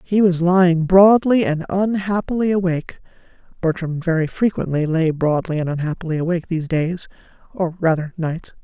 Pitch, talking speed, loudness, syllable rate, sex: 175 Hz, 130 wpm, -19 LUFS, 5.3 syllables/s, female